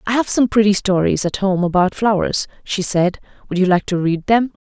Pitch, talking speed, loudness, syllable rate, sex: 195 Hz, 220 wpm, -17 LUFS, 5.3 syllables/s, female